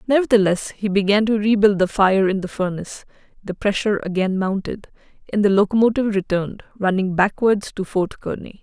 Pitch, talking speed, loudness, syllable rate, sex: 200 Hz, 160 wpm, -19 LUFS, 5.7 syllables/s, female